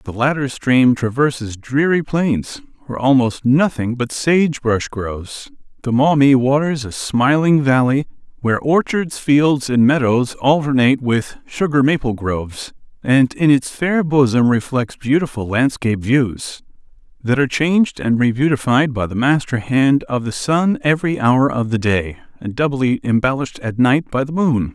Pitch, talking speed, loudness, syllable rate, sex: 135 Hz, 150 wpm, -16 LUFS, 4.5 syllables/s, male